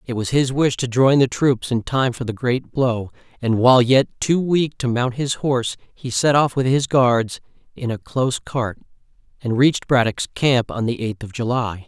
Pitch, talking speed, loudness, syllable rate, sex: 125 Hz, 220 wpm, -19 LUFS, 4.7 syllables/s, male